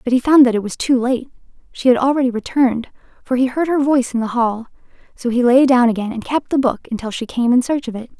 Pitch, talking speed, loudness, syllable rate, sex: 250 Hz, 265 wpm, -17 LUFS, 6.3 syllables/s, female